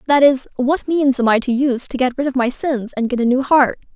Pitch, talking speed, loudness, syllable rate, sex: 260 Hz, 290 wpm, -17 LUFS, 5.6 syllables/s, female